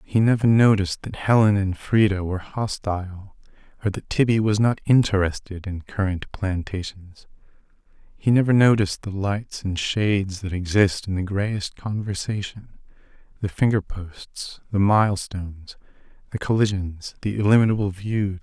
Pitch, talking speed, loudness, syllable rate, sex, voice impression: 100 Hz, 135 wpm, -22 LUFS, 4.7 syllables/s, male, masculine, adult-like, relaxed, weak, slightly dark, soft, cool, calm, friendly, reassuring, kind, modest